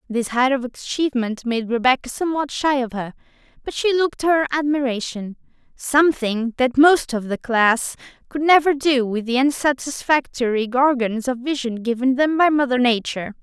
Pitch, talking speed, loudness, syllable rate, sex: 260 Hz, 155 wpm, -19 LUFS, 5.1 syllables/s, female